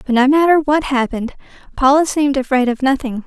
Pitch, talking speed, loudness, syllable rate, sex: 270 Hz, 185 wpm, -15 LUFS, 6.2 syllables/s, female